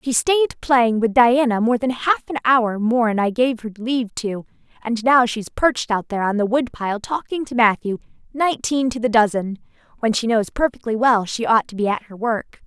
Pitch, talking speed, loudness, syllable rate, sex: 235 Hz, 210 wpm, -19 LUFS, 5.2 syllables/s, female